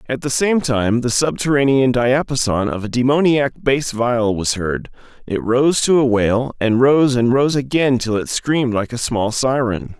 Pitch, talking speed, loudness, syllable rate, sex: 125 Hz, 185 wpm, -17 LUFS, 4.4 syllables/s, male